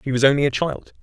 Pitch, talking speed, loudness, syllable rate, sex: 140 Hz, 295 wpm, -20 LUFS, 7.0 syllables/s, male